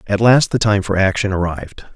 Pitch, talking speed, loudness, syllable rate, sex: 105 Hz, 215 wpm, -16 LUFS, 5.8 syllables/s, male